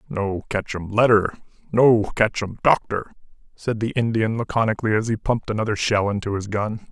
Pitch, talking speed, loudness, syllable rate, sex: 110 Hz, 155 wpm, -21 LUFS, 5.5 syllables/s, male